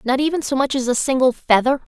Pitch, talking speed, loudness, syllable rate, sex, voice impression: 265 Hz, 245 wpm, -18 LUFS, 6.3 syllables/s, female, very feminine, young, very thin, tensed, very powerful, very bright, hard, very clear, very fluent, slightly raspy, very cute, intellectual, very refreshing, sincere, slightly calm, very friendly, very reassuring, very unique, elegant, slightly wild, sweet, lively, kind, slightly intense, slightly modest, light